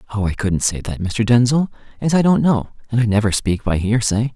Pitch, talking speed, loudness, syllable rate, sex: 115 Hz, 235 wpm, -18 LUFS, 5.5 syllables/s, male